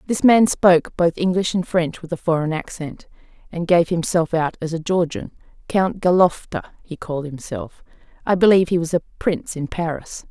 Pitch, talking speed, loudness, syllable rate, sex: 170 Hz, 175 wpm, -20 LUFS, 5.3 syllables/s, female